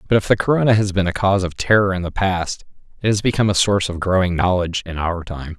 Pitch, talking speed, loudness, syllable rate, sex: 95 Hz, 260 wpm, -18 LUFS, 6.8 syllables/s, male